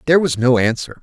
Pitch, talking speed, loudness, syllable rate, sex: 135 Hz, 235 wpm, -16 LUFS, 6.9 syllables/s, male